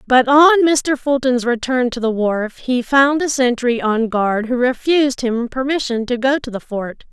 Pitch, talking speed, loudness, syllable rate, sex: 250 Hz, 195 wpm, -16 LUFS, 4.3 syllables/s, female